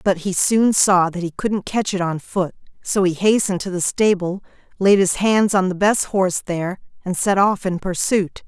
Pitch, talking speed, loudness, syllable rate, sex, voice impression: 190 Hz, 210 wpm, -19 LUFS, 4.8 syllables/s, female, feminine, adult-like, tensed, powerful, clear, slightly halting, intellectual, slightly calm, elegant, strict, slightly sharp